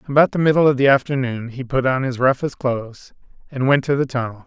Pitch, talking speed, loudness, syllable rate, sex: 130 Hz, 230 wpm, -18 LUFS, 6.1 syllables/s, male